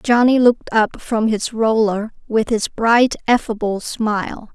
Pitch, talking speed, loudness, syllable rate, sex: 225 Hz, 145 wpm, -17 LUFS, 4.0 syllables/s, female